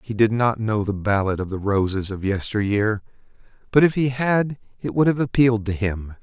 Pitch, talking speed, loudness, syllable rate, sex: 110 Hz, 200 wpm, -21 LUFS, 5.2 syllables/s, male